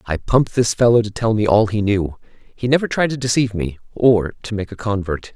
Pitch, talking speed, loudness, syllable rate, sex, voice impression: 110 Hz, 235 wpm, -18 LUFS, 5.7 syllables/s, male, very masculine, very middle-aged, thick, tensed, powerful, bright, slightly hard, slightly muffled, fluent, slightly raspy, cool, very intellectual, refreshing, very sincere, calm, mature, friendly, reassuring, unique, elegant, slightly wild, slightly sweet, lively, kind, slightly light